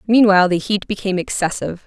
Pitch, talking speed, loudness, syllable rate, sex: 195 Hz, 160 wpm, -17 LUFS, 7.0 syllables/s, female